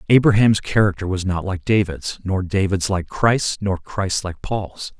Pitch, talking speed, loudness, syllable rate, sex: 95 Hz, 170 wpm, -20 LUFS, 4.3 syllables/s, male